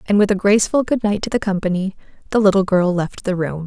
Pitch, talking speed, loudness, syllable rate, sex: 195 Hz, 245 wpm, -18 LUFS, 6.2 syllables/s, female